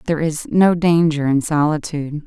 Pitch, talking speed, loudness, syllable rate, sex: 155 Hz, 160 wpm, -17 LUFS, 5.0 syllables/s, female